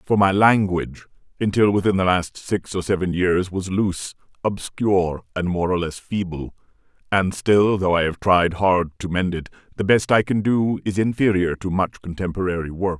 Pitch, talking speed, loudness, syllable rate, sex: 95 Hz, 185 wpm, -21 LUFS, 4.9 syllables/s, male